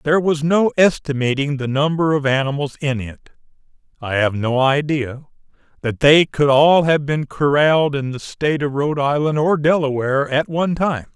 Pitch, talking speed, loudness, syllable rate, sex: 145 Hz, 170 wpm, -17 LUFS, 5.1 syllables/s, male